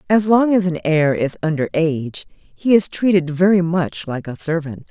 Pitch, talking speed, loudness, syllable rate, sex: 170 Hz, 195 wpm, -18 LUFS, 4.6 syllables/s, female